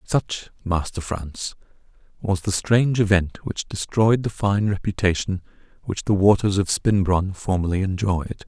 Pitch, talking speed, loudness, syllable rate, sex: 95 Hz, 135 wpm, -22 LUFS, 4.4 syllables/s, male